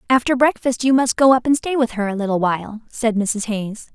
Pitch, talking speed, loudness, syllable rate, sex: 235 Hz, 245 wpm, -18 LUFS, 5.4 syllables/s, female